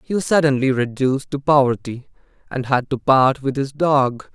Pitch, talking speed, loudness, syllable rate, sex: 135 Hz, 180 wpm, -18 LUFS, 5.0 syllables/s, male